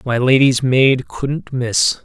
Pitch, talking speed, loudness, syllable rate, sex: 125 Hz, 145 wpm, -15 LUFS, 3.1 syllables/s, male